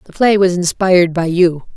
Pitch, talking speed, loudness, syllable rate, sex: 180 Hz, 205 wpm, -13 LUFS, 5.2 syllables/s, female